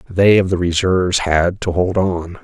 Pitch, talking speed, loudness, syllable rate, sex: 90 Hz, 195 wpm, -16 LUFS, 4.4 syllables/s, male